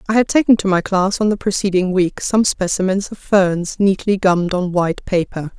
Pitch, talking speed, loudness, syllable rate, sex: 190 Hz, 205 wpm, -17 LUFS, 5.2 syllables/s, female